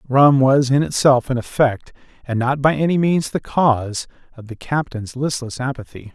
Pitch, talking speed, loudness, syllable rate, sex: 130 Hz, 175 wpm, -18 LUFS, 4.8 syllables/s, male